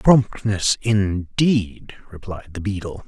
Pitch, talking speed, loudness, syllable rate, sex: 100 Hz, 100 wpm, -20 LUFS, 3.3 syllables/s, male